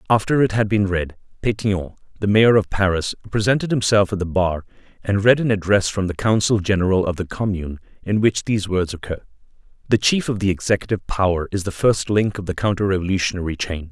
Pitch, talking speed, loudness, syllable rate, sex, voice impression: 100 Hz, 200 wpm, -20 LUFS, 6.0 syllables/s, male, very masculine, adult-like, slightly middle-aged, very thick, tensed, slightly powerful, slightly bright, soft, slightly muffled, fluent, very cool, very intellectual, refreshing, sincere, very calm, very mature, very friendly, very reassuring, slightly unique, slightly elegant, very wild, sweet, kind, slightly modest